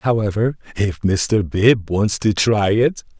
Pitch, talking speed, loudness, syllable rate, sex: 105 Hz, 150 wpm, -18 LUFS, 3.7 syllables/s, male